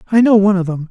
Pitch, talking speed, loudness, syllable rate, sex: 195 Hz, 330 wpm, -13 LUFS, 9.0 syllables/s, male